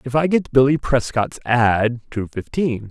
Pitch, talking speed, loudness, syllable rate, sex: 125 Hz, 165 wpm, -19 LUFS, 4.1 syllables/s, male